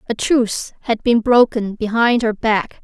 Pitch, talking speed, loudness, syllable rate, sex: 230 Hz, 170 wpm, -17 LUFS, 4.5 syllables/s, female